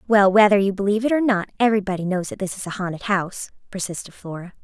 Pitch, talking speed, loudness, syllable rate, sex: 195 Hz, 220 wpm, -20 LUFS, 7.1 syllables/s, female